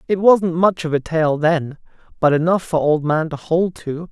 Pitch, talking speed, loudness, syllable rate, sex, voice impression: 165 Hz, 220 wpm, -18 LUFS, 4.6 syllables/s, male, masculine, adult-like, thin, weak, slightly bright, slightly halting, refreshing, calm, friendly, reassuring, kind, modest